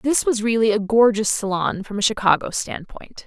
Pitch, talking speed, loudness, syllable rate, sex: 215 Hz, 185 wpm, -19 LUFS, 5.0 syllables/s, female